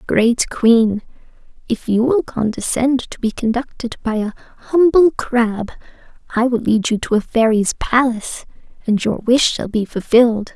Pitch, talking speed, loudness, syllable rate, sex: 235 Hz, 155 wpm, -17 LUFS, 4.5 syllables/s, female